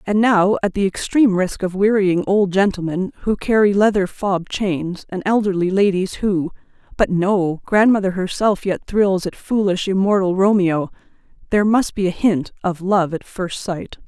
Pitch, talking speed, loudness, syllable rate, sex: 190 Hz, 160 wpm, -18 LUFS, 4.6 syllables/s, female